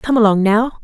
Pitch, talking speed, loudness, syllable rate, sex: 225 Hz, 215 wpm, -14 LUFS, 5.1 syllables/s, female